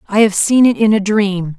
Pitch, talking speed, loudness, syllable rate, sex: 205 Hz, 265 wpm, -13 LUFS, 4.9 syllables/s, female